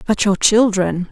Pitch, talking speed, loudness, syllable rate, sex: 205 Hz, 160 wpm, -15 LUFS, 4.1 syllables/s, female